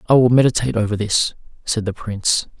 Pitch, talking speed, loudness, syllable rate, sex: 110 Hz, 185 wpm, -18 LUFS, 6.2 syllables/s, male